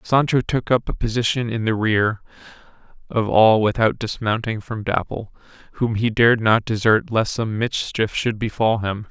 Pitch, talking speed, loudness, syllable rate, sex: 110 Hz, 165 wpm, -20 LUFS, 4.7 syllables/s, male